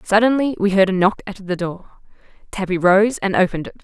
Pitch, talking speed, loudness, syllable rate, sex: 195 Hz, 205 wpm, -18 LUFS, 6.0 syllables/s, female